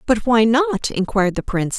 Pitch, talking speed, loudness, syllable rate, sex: 225 Hz, 200 wpm, -18 LUFS, 5.3 syllables/s, female